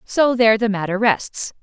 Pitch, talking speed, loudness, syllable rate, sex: 220 Hz, 185 wpm, -18 LUFS, 4.8 syllables/s, female